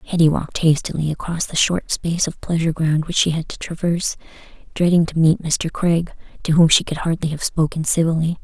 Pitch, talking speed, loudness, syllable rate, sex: 165 Hz, 200 wpm, -19 LUFS, 5.8 syllables/s, female